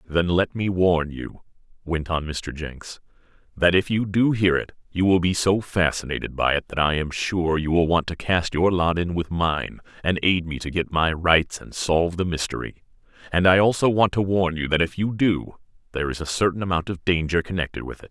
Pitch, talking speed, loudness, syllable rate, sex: 85 Hz, 225 wpm, -22 LUFS, 5.1 syllables/s, male